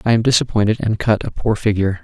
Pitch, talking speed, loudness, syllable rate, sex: 110 Hz, 235 wpm, -17 LUFS, 6.9 syllables/s, male